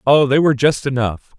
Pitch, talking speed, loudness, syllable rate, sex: 135 Hz, 215 wpm, -16 LUFS, 5.7 syllables/s, male